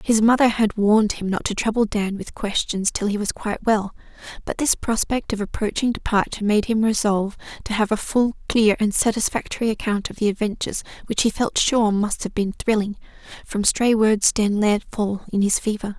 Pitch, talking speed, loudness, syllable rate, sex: 215 Hz, 200 wpm, -21 LUFS, 5.4 syllables/s, female